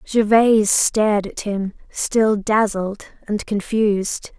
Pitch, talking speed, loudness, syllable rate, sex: 215 Hz, 110 wpm, -19 LUFS, 3.8 syllables/s, female